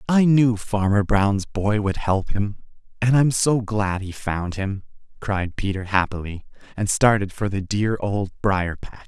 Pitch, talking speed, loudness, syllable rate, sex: 105 Hz, 170 wpm, -22 LUFS, 4.0 syllables/s, male